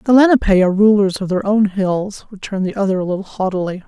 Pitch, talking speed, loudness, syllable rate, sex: 200 Hz, 215 wpm, -16 LUFS, 6.5 syllables/s, female